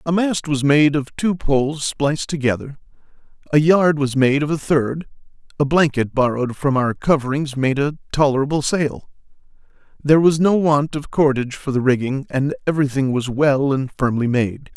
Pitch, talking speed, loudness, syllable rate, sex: 140 Hz, 170 wpm, -18 LUFS, 5.1 syllables/s, male